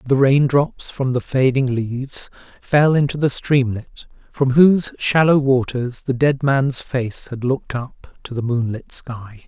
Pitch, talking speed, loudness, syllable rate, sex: 130 Hz, 165 wpm, -18 LUFS, 4.0 syllables/s, male